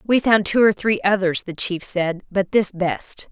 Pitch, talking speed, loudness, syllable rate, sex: 195 Hz, 215 wpm, -20 LUFS, 4.2 syllables/s, female